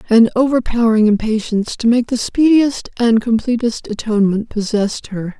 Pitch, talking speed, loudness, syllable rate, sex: 230 Hz, 135 wpm, -16 LUFS, 5.4 syllables/s, female